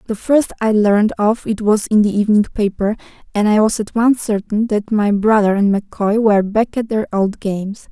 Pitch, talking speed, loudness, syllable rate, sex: 210 Hz, 210 wpm, -16 LUFS, 5.3 syllables/s, female